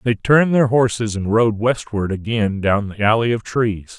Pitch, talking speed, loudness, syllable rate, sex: 110 Hz, 195 wpm, -18 LUFS, 4.6 syllables/s, male